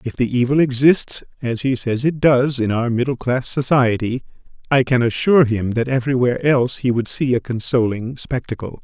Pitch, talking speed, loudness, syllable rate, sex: 125 Hz, 185 wpm, -18 LUFS, 5.4 syllables/s, male